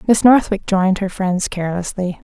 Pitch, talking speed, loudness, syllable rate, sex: 190 Hz, 155 wpm, -17 LUFS, 5.3 syllables/s, female